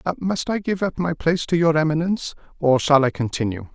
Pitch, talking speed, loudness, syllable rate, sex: 155 Hz, 210 wpm, -21 LUFS, 6.1 syllables/s, male